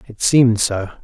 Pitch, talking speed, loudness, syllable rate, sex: 115 Hz, 175 wpm, -16 LUFS, 5.3 syllables/s, male